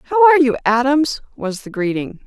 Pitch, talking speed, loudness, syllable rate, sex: 260 Hz, 185 wpm, -16 LUFS, 5.6 syllables/s, female